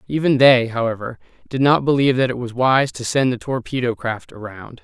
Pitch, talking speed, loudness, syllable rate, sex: 125 Hz, 200 wpm, -18 LUFS, 5.5 syllables/s, male